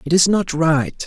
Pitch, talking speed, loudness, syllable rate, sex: 160 Hz, 225 wpm, -17 LUFS, 4.1 syllables/s, male